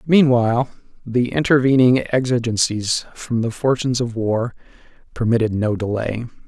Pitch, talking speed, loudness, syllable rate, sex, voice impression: 120 Hz, 110 wpm, -19 LUFS, 4.9 syllables/s, male, masculine, adult-like, relaxed, slightly bright, slightly muffled, slightly raspy, slightly cool, sincere, calm, mature, friendly, kind, slightly modest